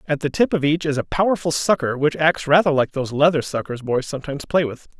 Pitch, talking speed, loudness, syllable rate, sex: 150 Hz, 240 wpm, -20 LUFS, 6.3 syllables/s, male